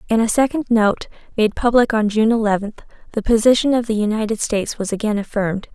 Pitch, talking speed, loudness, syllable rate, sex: 220 Hz, 190 wpm, -18 LUFS, 6.1 syllables/s, female